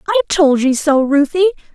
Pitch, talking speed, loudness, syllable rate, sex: 300 Hz, 170 wpm, -14 LUFS, 5.3 syllables/s, female